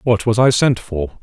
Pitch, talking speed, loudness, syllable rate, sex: 110 Hz, 245 wpm, -16 LUFS, 4.8 syllables/s, male